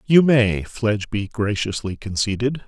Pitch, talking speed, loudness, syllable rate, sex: 110 Hz, 110 wpm, -21 LUFS, 4.5 syllables/s, male